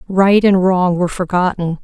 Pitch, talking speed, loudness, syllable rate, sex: 185 Hz, 165 wpm, -14 LUFS, 4.8 syllables/s, female